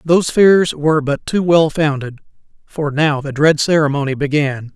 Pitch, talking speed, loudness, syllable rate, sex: 150 Hz, 165 wpm, -15 LUFS, 4.8 syllables/s, male